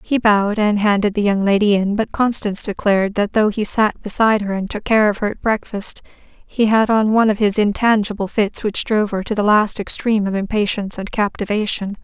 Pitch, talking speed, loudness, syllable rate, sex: 210 Hz, 215 wpm, -17 LUFS, 5.6 syllables/s, female